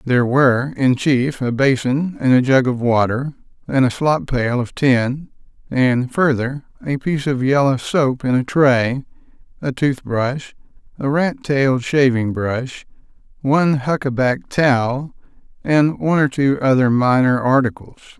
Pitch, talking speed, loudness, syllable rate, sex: 135 Hz, 150 wpm, -17 LUFS, 4.3 syllables/s, male